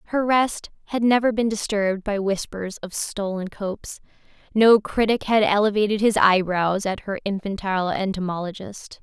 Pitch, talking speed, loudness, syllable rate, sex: 205 Hz, 140 wpm, -22 LUFS, 4.9 syllables/s, female